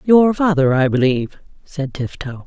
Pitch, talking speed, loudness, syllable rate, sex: 150 Hz, 145 wpm, -17 LUFS, 4.8 syllables/s, female